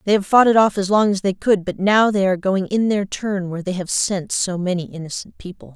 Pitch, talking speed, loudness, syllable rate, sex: 195 Hz, 270 wpm, -18 LUFS, 5.7 syllables/s, female